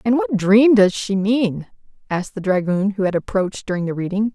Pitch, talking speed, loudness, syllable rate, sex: 200 Hz, 205 wpm, -18 LUFS, 5.4 syllables/s, female